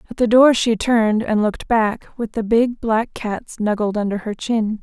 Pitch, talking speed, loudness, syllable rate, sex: 220 Hz, 210 wpm, -18 LUFS, 4.7 syllables/s, female